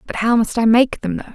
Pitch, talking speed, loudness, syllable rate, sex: 225 Hz, 310 wpm, -17 LUFS, 6.2 syllables/s, female